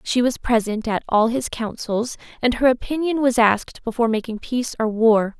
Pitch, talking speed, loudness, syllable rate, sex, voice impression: 235 Hz, 190 wpm, -20 LUFS, 5.3 syllables/s, female, very feminine, slightly young, cute, refreshing, friendly, slightly sweet, slightly kind